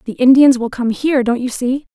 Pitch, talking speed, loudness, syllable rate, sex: 255 Hz, 245 wpm, -14 LUFS, 5.7 syllables/s, female